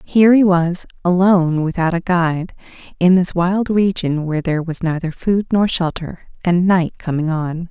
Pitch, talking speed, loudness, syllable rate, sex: 175 Hz, 170 wpm, -17 LUFS, 4.9 syllables/s, female